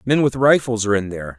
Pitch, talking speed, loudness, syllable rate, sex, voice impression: 110 Hz, 260 wpm, -17 LUFS, 7.1 syllables/s, male, masculine, adult-like, fluent, cool, slightly elegant